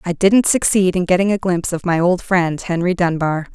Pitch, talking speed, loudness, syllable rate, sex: 180 Hz, 220 wpm, -16 LUFS, 5.3 syllables/s, female